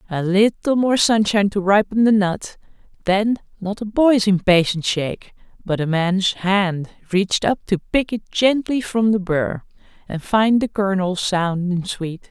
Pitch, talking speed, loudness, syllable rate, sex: 200 Hz, 165 wpm, -19 LUFS, 4.2 syllables/s, female